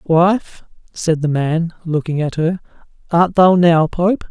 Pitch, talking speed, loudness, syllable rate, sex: 165 Hz, 155 wpm, -16 LUFS, 3.7 syllables/s, male